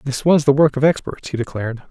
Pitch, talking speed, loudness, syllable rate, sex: 135 Hz, 250 wpm, -18 LUFS, 6.3 syllables/s, male